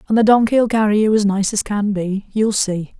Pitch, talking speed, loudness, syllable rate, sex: 210 Hz, 240 wpm, -17 LUFS, 5.1 syllables/s, female